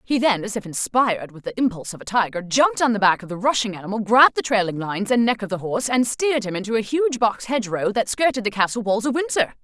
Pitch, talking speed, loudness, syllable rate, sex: 220 Hz, 275 wpm, -21 LUFS, 6.6 syllables/s, female